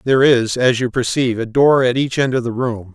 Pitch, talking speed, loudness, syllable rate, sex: 125 Hz, 225 wpm, -16 LUFS, 5.7 syllables/s, male